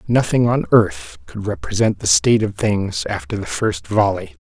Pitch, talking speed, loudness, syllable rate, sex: 110 Hz, 175 wpm, -18 LUFS, 4.7 syllables/s, male